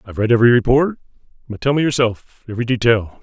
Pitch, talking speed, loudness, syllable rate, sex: 120 Hz, 165 wpm, -16 LUFS, 7.3 syllables/s, male